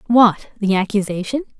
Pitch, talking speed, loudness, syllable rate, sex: 215 Hz, 115 wpm, -18 LUFS, 5.0 syllables/s, female